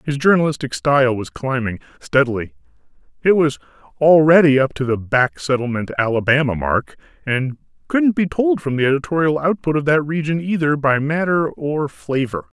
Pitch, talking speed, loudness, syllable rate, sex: 145 Hz, 155 wpm, -18 LUFS, 5.1 syllables/s, male